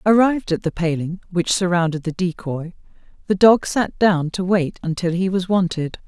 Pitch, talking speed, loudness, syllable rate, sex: 180 Hz, 180 wpm, -19 LUFS, 4.9 syllables/s, female